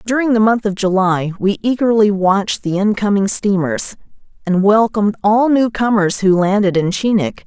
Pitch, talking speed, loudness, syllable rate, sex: 205 Hz, 160 wpm, -15 LUFS, 4.9 syllables/s, female